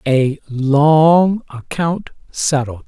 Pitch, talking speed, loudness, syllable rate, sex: 150 Hz, 85 wpm, -15 LUFS, 2.5 syllables/s, female